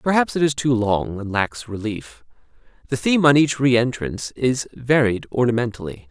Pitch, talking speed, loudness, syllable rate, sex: 125 Hz, 165 wpm, -20 LUFS, 5.1 syllables/s, male